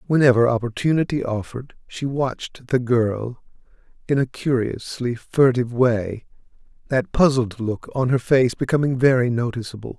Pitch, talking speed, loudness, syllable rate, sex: 125 Hz, 125 wpm, -21 LUFS, 4.9 syllables/s, male